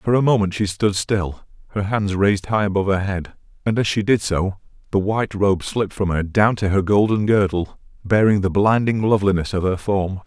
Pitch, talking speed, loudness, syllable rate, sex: 100 Hz, 210 wpm, -19 LUFS, 5.4 syllables/s, male